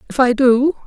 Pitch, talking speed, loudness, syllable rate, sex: 260 Hz, 205 wpm, -14 LUFS, 5.3 syllables/s, male